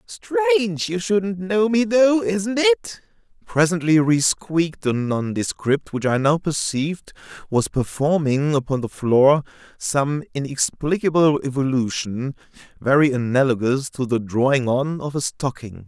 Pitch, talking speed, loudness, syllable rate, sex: 155 Hz, 130 wpm, -20 LUFS, 4.2 syllables/s, male